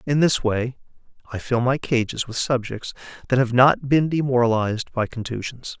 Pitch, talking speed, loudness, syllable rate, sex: 125 Hz, 165 wpm, -21 LUFS, 5.0 syllables/s, male